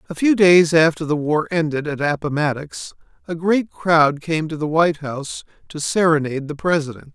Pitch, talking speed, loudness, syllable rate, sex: 160 Hz, 175 wpm, -18 LUFS, 5.2 syllables/s, male